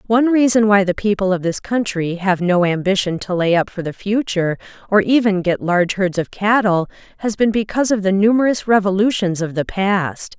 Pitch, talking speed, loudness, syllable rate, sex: 195 Hz, 195 wpm, -17 LUFS, 5.5 syllables/s, female